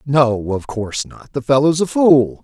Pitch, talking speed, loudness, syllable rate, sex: 135 Hz, 195 wpm, -17 LUFS, 4.3 syllables/s, male